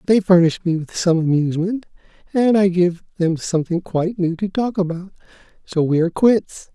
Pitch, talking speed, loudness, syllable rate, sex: 180 Hz, 180 wpm, -18 LUFS, 5.4 syllables/s, male